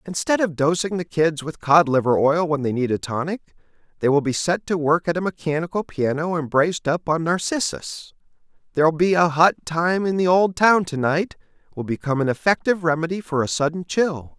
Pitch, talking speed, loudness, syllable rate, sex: 160 Hz, 205 wpm, -21 LUFS, 5.3 syllables/s, male